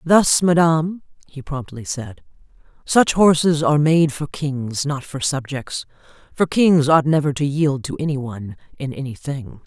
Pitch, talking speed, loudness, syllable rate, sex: 145 Hz, 155 wpm, -19 LUFS, 4.5 syllables/s, female